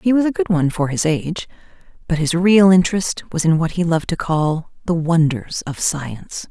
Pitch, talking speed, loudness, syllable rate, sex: 170 Hz, 210 wpm, -18 LUFS, 5.3 syllables/s, female